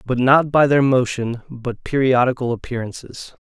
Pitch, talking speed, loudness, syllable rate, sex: 125 Hz, 140 wpm, -18 LUFS, 4.7 syllables/s, male